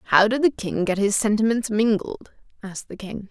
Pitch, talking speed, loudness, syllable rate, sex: 210 Hz, 200 wpm, -21 LUFS, 5.4 syllables/s, female